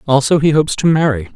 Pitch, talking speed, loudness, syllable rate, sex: 145 Hz, 220 wpm, -14 LUFS, 6.8 syllables/s, male